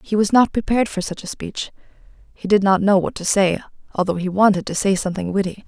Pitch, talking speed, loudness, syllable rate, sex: 195 Hz, 235 wpm, -19 LUFS, 6.3 syllables/s, female